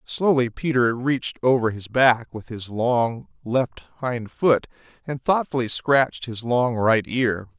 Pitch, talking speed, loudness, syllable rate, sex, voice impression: 120 Hz, 150 wpm, -22 LUFS, 4.0 syllables/s, male, very masculine, very adult-like, thick, tensed, slightly powerful, very bright, soft, clear, fluent, cool, intellectual, very refreshing, very sincere, slightly calm, friendly, reassuring, unique, slightly elegant, wild, sweet, very lively, kind, slightly intense